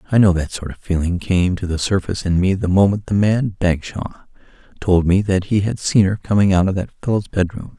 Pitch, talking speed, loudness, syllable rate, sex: 95 Hz, 230 wpm, -18 LUFS, 5.7 syllables/s, male